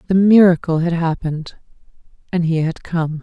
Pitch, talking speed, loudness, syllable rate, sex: 170 Hz, 150 wpm, -16 LUFS, 5.2 syllables/s, female